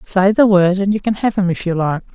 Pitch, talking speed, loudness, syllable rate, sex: 190 Hz, 305 wpm, -15 LUFS, 5.6 syllables/s, female